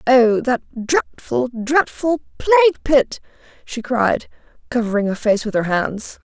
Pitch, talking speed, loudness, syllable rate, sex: 250 Hz, 135 wpm, -18 LUFS, 4.1 syllables/s, female